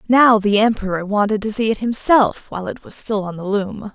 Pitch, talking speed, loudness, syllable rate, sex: 210 Hz, 230 wpm, -18 LUFS, 5.3 syllables/s, female